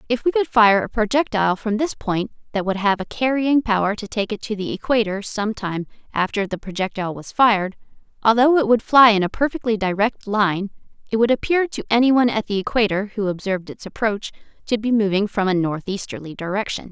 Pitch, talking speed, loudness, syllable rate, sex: 215 Hz, 200 wpm, -20 LUFS, 5.8 syllables/s, female